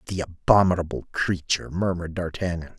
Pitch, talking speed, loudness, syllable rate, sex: 90 Hz, 110 wpm, -24 LUFS, 5.9 syllables/s, male